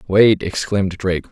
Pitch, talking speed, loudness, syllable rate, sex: 95 Hz, 135 wpm, -17 LUFS, 5.4 syllables/s, male